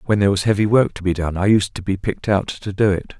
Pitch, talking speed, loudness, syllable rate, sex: 100 Hz, 320 wpm, -19 LUFS, 6.6 syllables/s, male